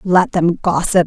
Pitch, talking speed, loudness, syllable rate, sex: 180 Hz, 170 wpm, -15 LUFS, 3.9 syllables/s, female